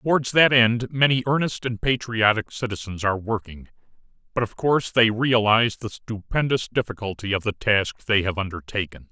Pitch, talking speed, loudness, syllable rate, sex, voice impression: 115 Hz, 160 wpm, -22 LUFS, 5.3 syllables/s, male, masculine, adult-like, tensed, powerful, clear, cool, intellectual, mature, friendly, wild, lively, strict